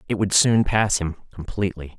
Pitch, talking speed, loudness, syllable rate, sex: 95 Hz, 180 wpm, -21 LUFS, 5.5 syllables/s, male